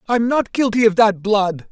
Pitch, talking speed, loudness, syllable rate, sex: 215 Hz, 210 wpm, -16 LUFS, 4.6 syllables/s, male